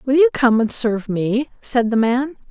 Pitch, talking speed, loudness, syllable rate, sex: 245 Hz, 215 wpm, -18 LUFS, 4.7 syllables/s, female